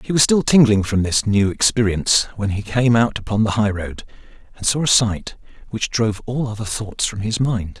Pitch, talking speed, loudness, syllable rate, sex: 110 Hz, 215 wpm, -18 LUFS, 5.2 syllables/s, male